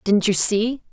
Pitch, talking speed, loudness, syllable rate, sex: 210 Hz, 195 wpm, -18 LUFS, 4.0 syllables/s, female